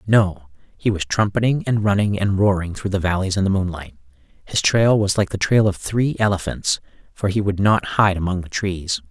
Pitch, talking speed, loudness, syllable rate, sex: 95 Hz, 205 wpm, -20 LUFS, 5.2 syllables/s, male